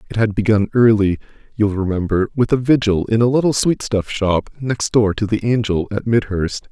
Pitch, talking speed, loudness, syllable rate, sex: 110 Hz, 195 wpm, -17 LUFS, 5.3 syllables/s, male